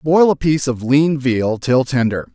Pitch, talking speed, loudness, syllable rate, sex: 135 Hz, 205 wpm, -16 LUFS, 4.6 syllables/s, male